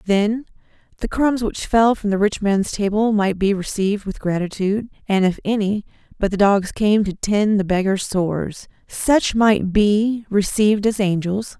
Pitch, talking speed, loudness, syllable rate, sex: 205 Hz, 170 wpm, -19 LUFS, 4.4 syllables/s, female